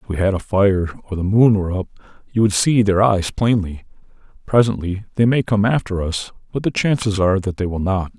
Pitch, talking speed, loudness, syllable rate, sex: 100 Hz, 220 wpm, -18 LUFS, 5.7 syllables/s, male